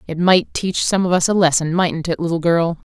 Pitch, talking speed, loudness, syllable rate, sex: 170 Hz, 245 wpm, -17 LUFS, 5.2 syllables/s, female